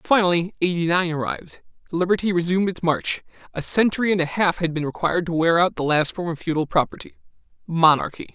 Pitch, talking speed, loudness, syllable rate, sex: 175 Hz, 180 wpm, -21 LUFS, 6.3 syllables/s, male